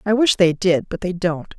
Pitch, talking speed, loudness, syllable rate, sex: 185 Hz, 265 wpm, -19 LUFS, 5.2 syllables/s, female